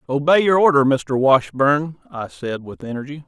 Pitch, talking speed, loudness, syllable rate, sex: 140 Hz, 165 wpm, -17 LUFS, 4.7 syllables/s, male